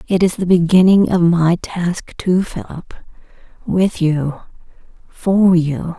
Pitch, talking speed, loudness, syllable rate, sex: 170 Hz, 120 wpm, -15 LUFS, 3.5 syllables/s, female